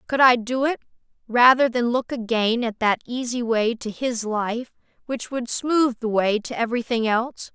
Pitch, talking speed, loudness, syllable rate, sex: 240 Hz, 185 wpm, -22 LUFS, 4.6 syllables/s, female